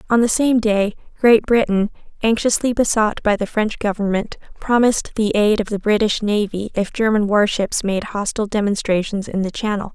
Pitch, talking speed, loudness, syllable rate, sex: 210 Hz, 170 wpm, -18 LUFS, 5.1 syllables/s, female